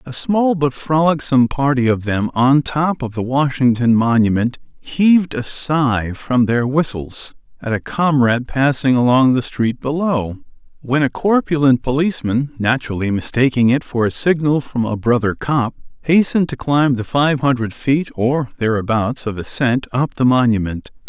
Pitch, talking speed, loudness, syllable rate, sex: 130 Hz, 155 wpm, -17 LUFS, 4.6 syllables/s, male